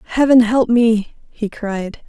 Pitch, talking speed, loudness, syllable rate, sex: 225 Hz, 145 wpm, -15 LUFS, 3.5 syllables/s, female